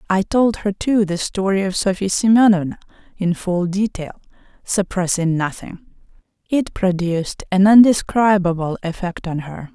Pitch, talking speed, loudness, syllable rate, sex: 190 Hz, 130 wpm, -18 LUFS, 4.6 syllables/s, female